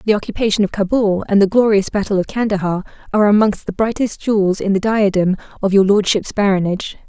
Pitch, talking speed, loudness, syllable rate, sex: 200 Hz, 185 wpm, -16 LUFS, 6.2 syllables/s, female